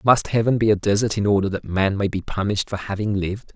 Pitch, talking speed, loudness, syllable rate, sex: 100 Hz, 255 wpm, -21 LUFS, 6.4 syllables/s, male